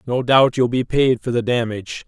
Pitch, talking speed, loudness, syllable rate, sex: 125 Hz, 230 wpm, -18 LUFS, 5.2 syllables/s, male